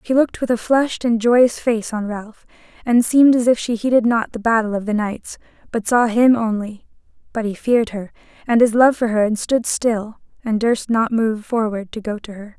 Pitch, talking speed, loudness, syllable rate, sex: 225 Hz, 225 wpm, -18 LUFS, 5.1 syllables/s, female